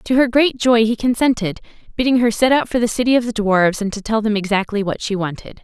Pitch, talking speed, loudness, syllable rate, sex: 225 Hz, 255 wpm, -17 LUFS, 5.9 syllables/s, female